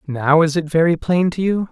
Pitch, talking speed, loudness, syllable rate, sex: 165 Hz, 245 wpm, -17 LUFS, 5.0 syllables/s, male